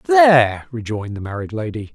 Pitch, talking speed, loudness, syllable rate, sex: 130 Hz, 155 wpm, -18 LUFS, 5.7 syllables/s, male